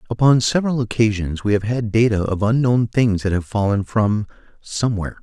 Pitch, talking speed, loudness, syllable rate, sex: 110 Hz, 160 wpm, -19 LUFS, 5.6 syllables/s, male